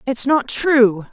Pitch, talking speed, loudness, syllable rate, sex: 250 Hz, 160 wpm, -15 LUFS, 3.2 syllables/s, female